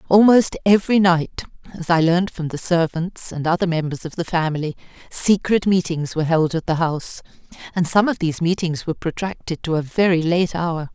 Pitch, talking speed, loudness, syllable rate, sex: 170 Hz, 185 wpm, -19 LUFS, 5.6 syllables/s, female